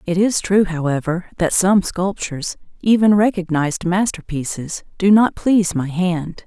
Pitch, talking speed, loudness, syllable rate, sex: 180 Hz, 140 wpm, -18 LUFS, 4.6 syllables/s, female